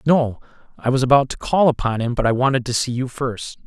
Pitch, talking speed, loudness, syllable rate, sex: 130 Hz, 245 wpm, -19 LUFS, 5.7 syllables/s, male